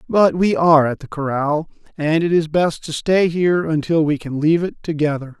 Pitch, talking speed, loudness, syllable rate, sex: 160 Hz, 210 wpm, -18 LUFS, 5.4 syllables/s, male